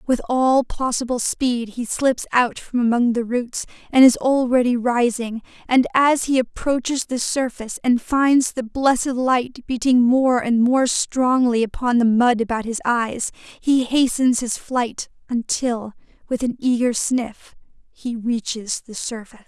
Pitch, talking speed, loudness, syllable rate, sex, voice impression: 245 Hz, 155 wpm, -20 LUFS, 4.1 syllables/s, female, very feminine, slightly young, slightly adult-like, very thin, slightly tensed, slightly weak, bright, slightly soft, clear, fluent, cute, intellectual, refreshing, sincere, slightly calm, slightly friendly, reassuring, very unique, elegant, wild, slightly sweet, very lively, very strict, slightly intense, sharp, light